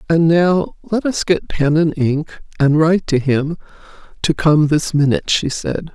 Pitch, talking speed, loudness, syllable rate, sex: 160 Hz, 180 wpm, -16 LUFS, 4.3 syllables/s, female